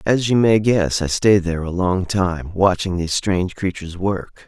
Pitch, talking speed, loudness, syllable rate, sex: 95 Hz, 200 wpm, -19 LUFS, 4.9 syllables/s, male